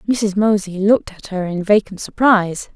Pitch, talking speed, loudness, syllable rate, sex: 200 Hz, 175 wpm, -17 LUFS, 5.1 syllables/s, female